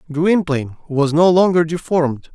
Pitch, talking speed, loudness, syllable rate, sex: 160 Hz, 130 wpm, -16 LUFS, 5.1 syllables/s, male